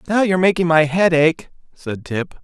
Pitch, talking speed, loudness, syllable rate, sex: 165 Hz, 195 wpm, -16 LUFS, 5.0 syllables/s, male